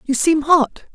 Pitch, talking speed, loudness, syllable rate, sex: 295 Hz, 190 wpm, -16 LUFS, 3.9 syllables/s, female